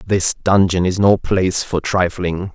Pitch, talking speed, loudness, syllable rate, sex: 95 Hz, 165 wpm, -16 LUFS, 4.1 syllables/s, male